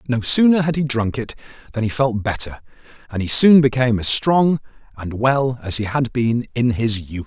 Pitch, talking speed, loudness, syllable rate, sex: 120 Hz, 205 wpm, -17 LUFS, 5.0 syllables/s, male